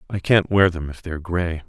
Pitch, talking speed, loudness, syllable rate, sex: 90 Hz, 285 wpm, -20 LUFS, 6.3 syllables/s, male